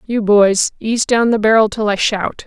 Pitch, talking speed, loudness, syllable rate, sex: 215 Hz, 220 wpm, -14 LUFS, 4.4 syllables/s, female